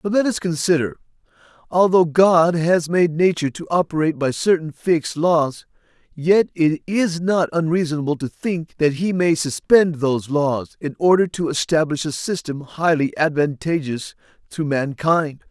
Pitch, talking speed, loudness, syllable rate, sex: 160 Hz, 145 wpm, -19 LUFS, 4.6 syllables/s, male